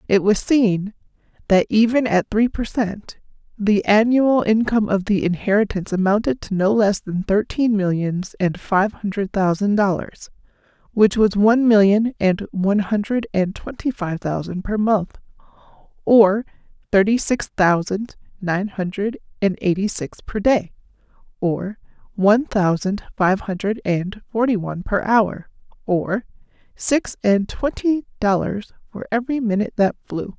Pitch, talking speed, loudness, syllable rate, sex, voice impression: 205 Hz, 140 wpm, -19 LUFS, 4.5 syllables/s, female, feminine, very adult-like, slightly soft, calm, slightly unique, elegant